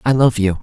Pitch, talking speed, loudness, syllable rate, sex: 115 Hz, 285 wpm, -15 LUFS, 5.7 syllables/s, male